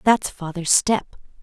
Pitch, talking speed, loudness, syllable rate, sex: 190 Hz, 125 wpm, -20 LUFS, 3.6 syllables/s, female